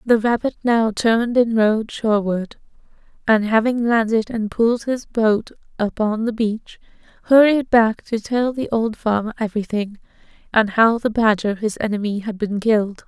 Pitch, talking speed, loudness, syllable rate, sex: 220 Hz, 155 wpm, -19 LUFS, 4.8 syllables/s, female